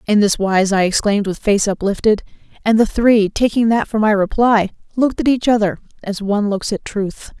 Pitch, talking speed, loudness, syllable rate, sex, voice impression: 210 Hz, 205 wpm, -16 LUFS, 5.4 syllables/s, female, feminine, adult-like, slightly relaxed, slightly bright, soft, slightly raspy, intellectual, calm, friendly, reassuring, kind, modest